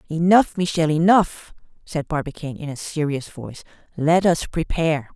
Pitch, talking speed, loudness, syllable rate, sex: 160 Hz, 140 wpm, -20 LUFS, 5.2 syllables/s, female